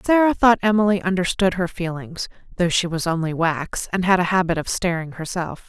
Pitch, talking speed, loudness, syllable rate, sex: 180 Hz, 190 wpm, -21 LUFS, 5.4 syllables/s, female